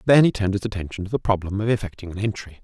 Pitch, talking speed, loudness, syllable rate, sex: 100 Hz, 275 wpm, -23 LUFS, 7.6 syllables/s, male